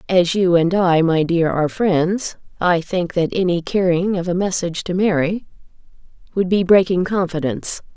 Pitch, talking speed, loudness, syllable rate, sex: 175 Hz, 165 wpm, -18 LUFS, 4.9 syllables/s, female